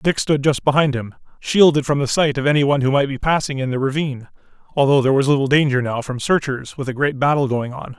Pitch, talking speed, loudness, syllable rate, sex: 140 Hz, 250 wpm, -18 LUFS, 6.4 syllables/s, male